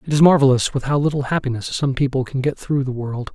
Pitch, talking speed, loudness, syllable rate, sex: 135 Hz, 250 wpm, -19 LUFS, 6.3 syllables/s, male